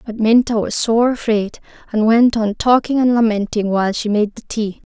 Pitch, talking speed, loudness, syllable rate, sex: 220 Hz, 195 wpm, -16 LUFS, 5.0 syllables/s, female